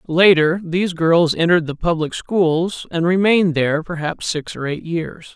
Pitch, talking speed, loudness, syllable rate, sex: 170 Hz, 170 wpm, -18 LUFS, 4.7 syllables/s, male